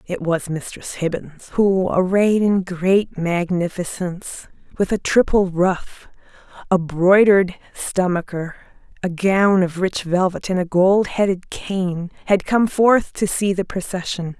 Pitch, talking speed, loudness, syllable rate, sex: 185 Hz, 140 wpm, -19 LUFS, 3.9 syllables/s, female